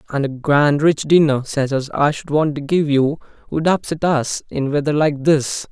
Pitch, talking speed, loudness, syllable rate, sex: 145 Hz, 210 wpm, -18 LUFS, 4.6 syllables/s, male